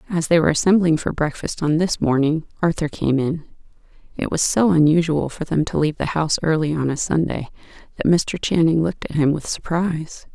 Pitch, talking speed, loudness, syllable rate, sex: 160 Hz, 195 wpm, -20 LUFS, 5.8 syllables/s, female